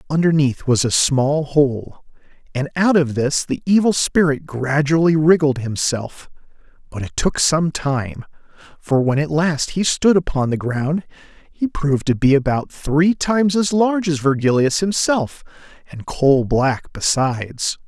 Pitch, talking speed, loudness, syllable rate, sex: 150 Hz, 150 wpm, -18 LUFS, 4.2 syllables/s, male